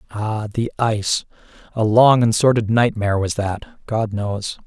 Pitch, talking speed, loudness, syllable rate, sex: 115 Hz, 155 wpm, -19 LUFS, 4.6 syllables/s, male